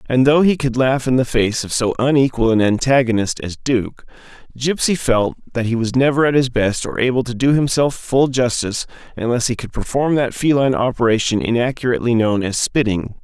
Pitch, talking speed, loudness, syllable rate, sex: 125 Hz, 190 wpm, -17 LUFS, 5.5 syllables/s, male